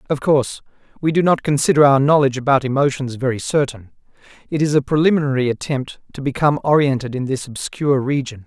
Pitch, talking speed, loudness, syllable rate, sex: 140 Hz, 170 wpm, -18 LUFS, 6.4 syllables/s, male